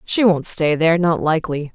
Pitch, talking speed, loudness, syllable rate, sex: 165 Hz, 205 wpm, -17 LUFS, 5.5 syllables/s, female